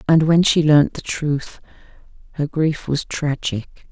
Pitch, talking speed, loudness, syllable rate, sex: 150 Hz, 155 wpm, -19 LUFS, 3.7 syllables/s, female